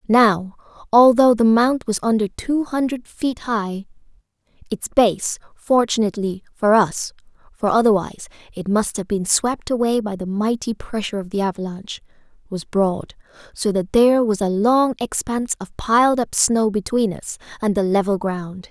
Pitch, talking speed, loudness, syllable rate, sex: 215 Hz, 150 wpm, -19 LUFS, 4.7 syllables/s, female